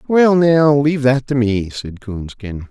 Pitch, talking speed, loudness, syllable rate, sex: 130 Hz, 180 wpm, -14 LUFS, 4.0 syllables/s, male